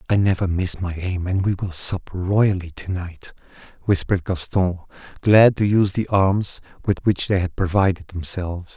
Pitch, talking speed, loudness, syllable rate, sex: 95 Hz, 170 wpm, -21 LUFS, 4.8 syllables/s, male